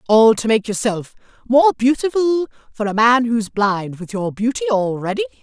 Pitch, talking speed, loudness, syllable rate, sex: 235 Hz, 165 wpm, -17 LUFS, 4.7 syllables/s, female